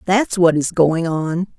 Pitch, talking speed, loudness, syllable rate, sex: 175 Hz, 190 wpm, -17 LUFS, 3.7 syllables/s, female